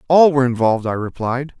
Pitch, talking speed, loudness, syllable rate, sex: 130 Hz, 190 wpm, -17 LUFS, 6.7 syllables/s, male